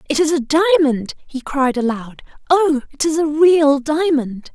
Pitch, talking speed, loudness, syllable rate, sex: 295 Hz, 170 wpm, -16 LUFS, 4.1 syllables/s, female